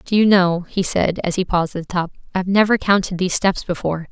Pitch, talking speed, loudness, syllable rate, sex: 185 Hz, 250 wpm, -18 LUFS, 6.4 syllables/s, female